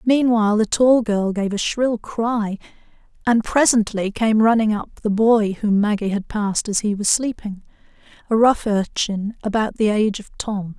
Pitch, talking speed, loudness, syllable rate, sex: 215 Hz, 165 wpm, -19 LUFS, 4.5 syllables/s, female